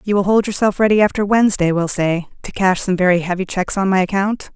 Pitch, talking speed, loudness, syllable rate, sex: 190 Hz, 235 wpm, -16 LUFS, 6.3 syllables/s, female